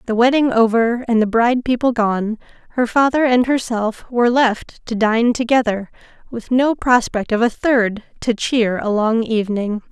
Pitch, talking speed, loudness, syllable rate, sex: 235 Hz, 170 wpm, -17 LUFS, 4.6 syllables/s, female